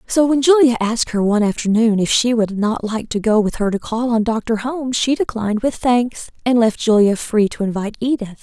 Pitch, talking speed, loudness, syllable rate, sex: 230 Hz, 230 wpm, -17 LUFS, 5.5 syllables/s, female